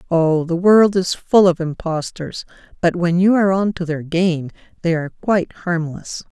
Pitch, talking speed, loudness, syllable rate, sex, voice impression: 175 Hz, 180 wpm, -18 LUFS, 4.8 syllables/s, female, feminine, very adult-like, slightly intellectual, calm, elegant, slightly kind